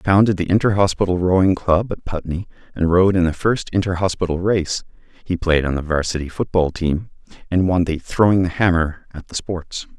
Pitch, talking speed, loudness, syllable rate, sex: 90 Hz, 200 wpm, -19 LUFS, 5.5 syllables/s, male